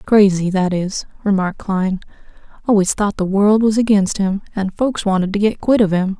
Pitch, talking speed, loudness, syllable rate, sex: 200 Hz, 195 wpm, -17 LUFS, 5.3 syllables/s, female